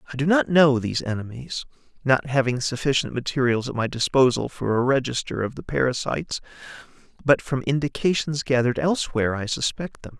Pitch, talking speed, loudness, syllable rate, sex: 130 Hz, 160 wpm, -23 LUFS, 5.9 syllables/s, male